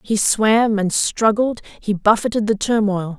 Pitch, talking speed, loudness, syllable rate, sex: 215 Hz, 150 wpm, -17 LUFS, 4.1 syllables/s, female